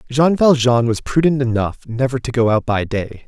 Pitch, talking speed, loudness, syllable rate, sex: 125 Hz, 200 wpm, -17 LUFS, 5.1 syllables/s, male